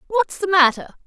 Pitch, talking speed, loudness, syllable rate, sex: 355 Hz, 170 wpm, -17 LUFS, 5.1 syllables/s, female